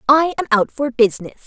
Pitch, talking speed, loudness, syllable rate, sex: 260 Hz, 205 wpm, -17 LUFS, 6.9 syllables/s, female